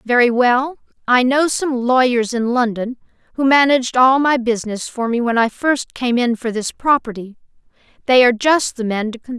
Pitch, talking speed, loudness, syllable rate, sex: 245 Hz, 190 wpm, -16 LUFS, 5.2 syllables/s, female